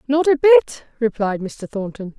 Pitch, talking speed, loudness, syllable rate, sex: 245 Hz, 165 wpm, -18 LUFS, 4.2 syllables/s, female